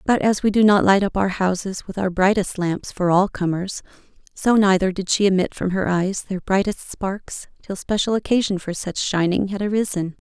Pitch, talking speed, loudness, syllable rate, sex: 195 Hz, 205 wpm, -20 LUFS, 5.0 syllables/s, female